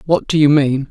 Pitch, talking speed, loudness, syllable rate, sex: 145 Hz, 265 wpm, -14 LUFS, 5.2 syllables/s, male